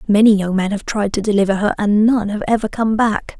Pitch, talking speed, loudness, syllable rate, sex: 210 Hz, 245 wpm, -16 LUFS, 5.7 syllables/s, female